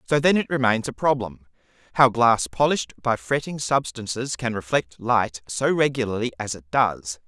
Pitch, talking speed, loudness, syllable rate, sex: 120 Hz, 165 wpm, -23 LUFS, 4.8 syllables/s, male